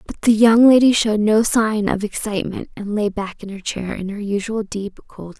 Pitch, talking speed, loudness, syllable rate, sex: 210 Hz, 235 wpm, -18 LUFS, 5.3 syllables/s, female